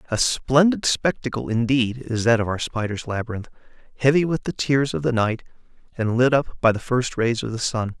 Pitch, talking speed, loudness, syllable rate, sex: 120 Hz, 205 wpm, -21 LUFS, 5.1 syllables/s, male